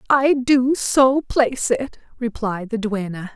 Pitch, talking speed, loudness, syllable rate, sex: 245 Hz, 145 wpm, -19 LUFS, 3.8 syllables/s, female